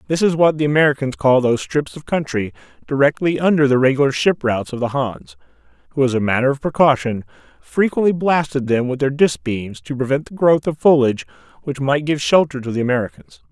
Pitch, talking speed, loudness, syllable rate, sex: 135 Hz, 200 wpm, -18 LUFS, 6.0 syllables/s, male